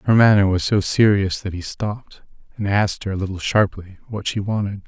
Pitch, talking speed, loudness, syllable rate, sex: 100 Hz, 210 wpm, -20 LUFS, 5.9 syllables/s, male